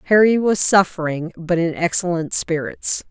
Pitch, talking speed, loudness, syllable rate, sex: 180 Hz, 135 wpm, -18 LUFS, 4.6 syllables/s, female